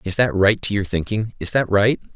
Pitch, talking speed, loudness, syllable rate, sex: 105 Hz, 250 wpm, -19 LUFS, 5.2 syllables/s, male